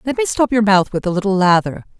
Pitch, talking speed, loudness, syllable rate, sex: 210 Hz, 270 wpm, -16 LUFS, 6.2 syllables/s, female